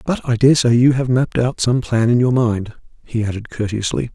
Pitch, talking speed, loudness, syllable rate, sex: 120 Hz, 215 wpm, -17 LUFS, 5.7 syllables/s, male